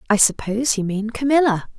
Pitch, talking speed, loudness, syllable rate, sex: 230 Hz, 170 wpm, -19 LUFS, 5.9 syllables/s, female